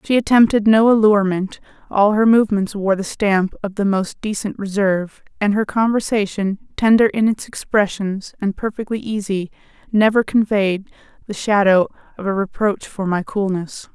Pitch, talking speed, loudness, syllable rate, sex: 205 Hz, 150 wpm, -18 LUFS, 4.9 syllables/s, female